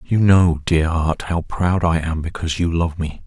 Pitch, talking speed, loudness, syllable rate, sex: 85 Hz, 220 wpm, -19 LUFS, 4.5 syllables/s, male